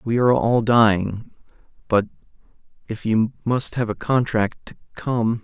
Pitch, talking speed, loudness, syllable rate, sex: 115 Hz, 145 wpm, -20 LUFS, 4.4 syllables/s, male